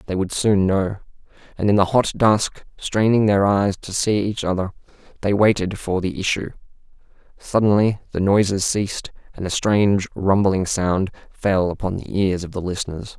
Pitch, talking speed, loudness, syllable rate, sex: 100 Hz, 170 wpm, -20 LUFS, 4.8 syllables/s, male